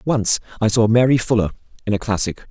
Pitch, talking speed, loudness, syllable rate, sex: 110 Hz, 190 wpm, -18 LUFS, 6.0 syllables/s, male